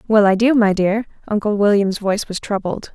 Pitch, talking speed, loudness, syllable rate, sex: 205 Hz, 205 wpm, -17 LUFS, 5.4 syllables/s, female